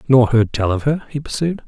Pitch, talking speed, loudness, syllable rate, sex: 130 Hz, 250 wpm, -18 LUFS, 5.5 syllables/s, male